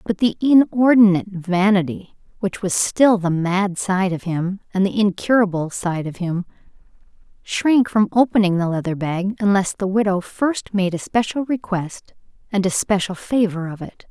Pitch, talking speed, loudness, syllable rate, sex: 195 Hz, 160 wpm, -19 LUFS, 4.6 syllables/s, female